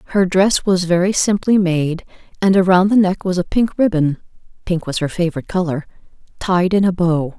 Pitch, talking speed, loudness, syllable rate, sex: 180 Hz, 170 wpm, -16 LUFS, 5.4 syllables/s, female